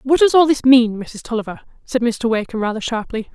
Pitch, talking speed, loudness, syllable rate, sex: 240 Hz, 215 wpm, -17 LUFS, 5.7 syllables/s, female